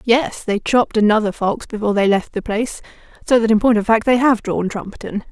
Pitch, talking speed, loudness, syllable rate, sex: 220 Hz, 205 wpm, -17 LUFS, 5.9 syllables/s, female